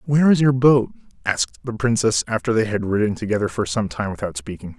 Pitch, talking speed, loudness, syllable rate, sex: 110 Hz, 215 wpm, -20 LUFS, 6.2 syllables/s, male